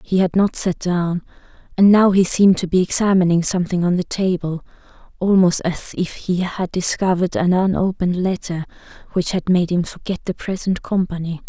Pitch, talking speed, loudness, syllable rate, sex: 180 Hz, 170 wpm, -18 LUFS, 5.5 syllables/s, female